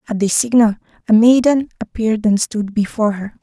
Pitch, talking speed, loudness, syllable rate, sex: 220 Hz, 175 wpm, -15 LUFS, 5.8 syllables/s, female